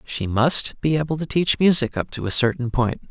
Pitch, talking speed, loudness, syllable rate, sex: 135 Hz, 230 wpm, -20 LUFS, 5.1 syllables/s, male